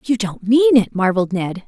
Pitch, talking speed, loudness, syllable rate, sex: 220 Hz, 215 wpm, -16 LUFS, 5.3 syllables/s, female